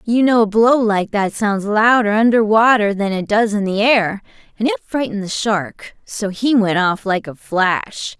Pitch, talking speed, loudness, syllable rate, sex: 215 Hz, 205 wpm, -16 LUFS, 4.3 syllables/s, female